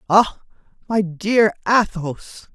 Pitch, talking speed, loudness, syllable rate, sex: 200 Hz, 95 wpm, -19 LUFS, 3.0 syllables/s, male